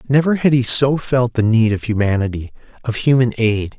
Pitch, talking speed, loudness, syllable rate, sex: 120 Hz, 190 wpm, -16 LUFS, 5.2 syllables/s, male